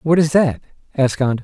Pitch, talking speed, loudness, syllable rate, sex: 145 Hz, 210 wpm, -17 LUFS, 6.4 syllables/s, male